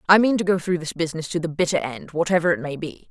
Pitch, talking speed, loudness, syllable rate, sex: 170 Hz, 270 wpm, -22 LUFS, 6.8 syllables/s, female